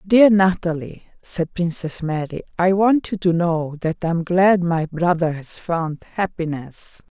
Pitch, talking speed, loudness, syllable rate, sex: 170 Hz, 160 wpm, -20 LUFS, 4.0 syllables/s, female